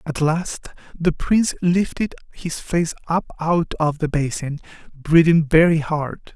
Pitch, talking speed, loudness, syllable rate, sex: 160 Hz, 140 wpm, -20 LUFS, 3.9 syllables/s, male